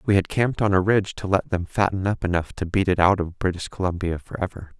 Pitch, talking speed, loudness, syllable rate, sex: 95 Hz, 265 wpm, -23 LUFS, 6.3 syllables/s, male